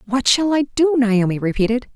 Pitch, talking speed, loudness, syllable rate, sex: 245 Hz, 185 wpm, -17 LUFS, 5.5 syllables/s, female